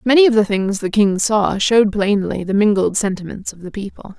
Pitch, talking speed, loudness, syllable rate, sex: 205 Hz, 215 wpm, -16 LUFS, 5.4 syllables/s, female